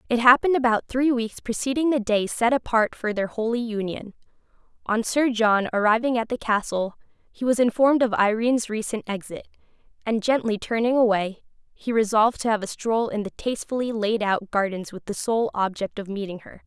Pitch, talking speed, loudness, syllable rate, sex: 225 Hz, 185 wpm, -23 LUFS, 5.5 syllables/s, female